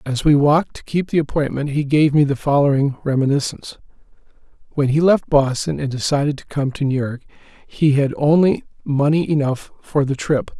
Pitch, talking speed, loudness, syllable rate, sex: 145 Hz, 180 wpm, -18 LUFS, 5.4 syllables/s, male